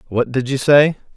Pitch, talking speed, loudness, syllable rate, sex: 135 Hz, 205 wpm, -16 LUFS, 4.9 syllables/s, male